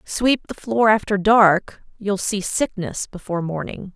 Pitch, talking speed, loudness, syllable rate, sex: 205 Hz, 150 wpm, -20 LUFS, 4.1 syllables/s, female